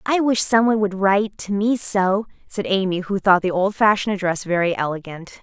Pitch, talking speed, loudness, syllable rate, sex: 195 Hz, 190 wpm, -19 LUFS, 5.5 syllables/s, female